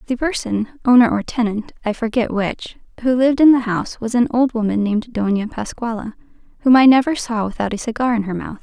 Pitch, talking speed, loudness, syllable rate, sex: 230 Hz, 195 wpm, -18 LUFS, 6.0 syllables/s, female